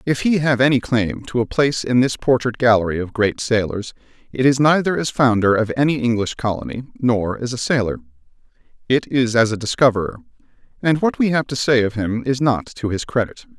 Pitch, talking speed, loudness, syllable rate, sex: 125 Hz, 205 wpm, -18 LUFS, 5.6 syllables/s, male